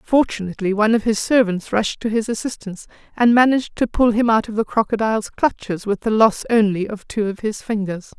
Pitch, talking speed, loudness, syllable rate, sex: 220 Hz, 205 wpm, -19 LUFS, 5.9 syllables/s, female